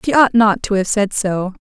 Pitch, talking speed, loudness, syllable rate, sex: 210 Hz, 260 wpm, -15 LUFS, 4.8 syllables/s, female